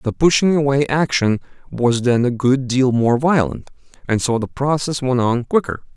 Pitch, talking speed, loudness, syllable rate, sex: 130 Hz, 180 wpm, -17 LUFS, 4.7 syllables/s, male